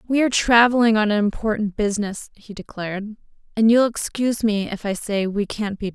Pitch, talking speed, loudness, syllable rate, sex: 215 Hz, 190 wpm, -20 LUFS, 5.9 syllables/s, female